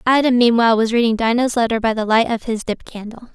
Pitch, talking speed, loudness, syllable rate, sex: 230 Hz, 235 wpm, -17 LUFS, 6.2 syllables/s, female